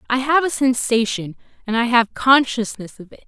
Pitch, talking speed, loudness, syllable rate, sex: 240 Hz, 185 wpm, -18 LUFS, 5.1 syllables/s, female